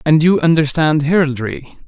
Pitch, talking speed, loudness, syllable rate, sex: 155 Hz, 130 wpm, -14 LUFS, 4.8 syllables/s, male